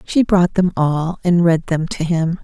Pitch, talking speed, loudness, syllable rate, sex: 170 Hz, 220 wpm, -17 LUFS, 4.0 syllables/s, female